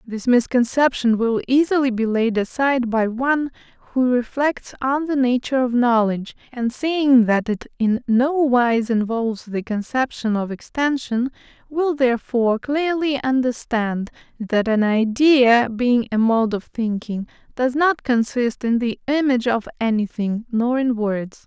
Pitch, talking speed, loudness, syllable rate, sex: 245 Hz, 145 wpm, -20 LUFS, 4.2 syllables/s, female